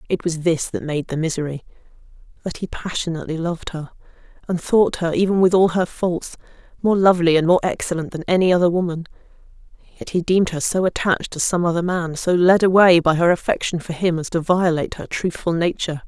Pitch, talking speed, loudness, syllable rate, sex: 170 Hz, 195 wpm, -19 LUFS, 6.1 syllables/s, female